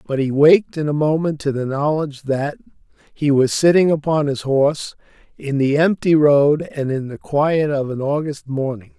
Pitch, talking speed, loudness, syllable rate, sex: 145 Hz, 185 wpm, -18 LUFS, 4.8 syllables/s, male